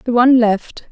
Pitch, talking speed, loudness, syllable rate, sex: 235 Hz, 195 wpm, -14 LUFS, 5.2 syllables/s, female